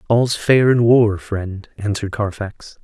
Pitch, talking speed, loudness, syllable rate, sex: 105 Hz, 150 wpm, -17 LUFS, 3.9 syllables/s, male